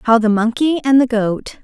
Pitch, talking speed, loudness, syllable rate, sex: 240 Hz, 220 wpm, -15 LUFS, 4.6 syllables/s, female